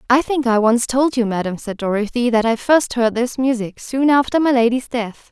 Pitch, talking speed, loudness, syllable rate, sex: 240 Hz, 225 wpm, -17 LUFS, 5.1 syllables/s, female